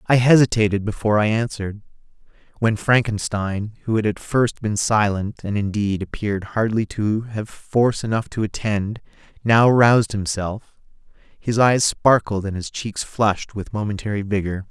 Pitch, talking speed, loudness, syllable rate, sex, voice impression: 105 Hz, 145 wpm, -20 LUFS, 4.8 syllables/s, male, masculine, very adult-like, cool, sincere, slightly friendly